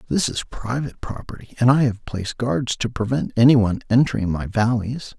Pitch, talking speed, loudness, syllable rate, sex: 115 Hz, 175 wpm, -20 LUFS, 5.6 syllables/s, male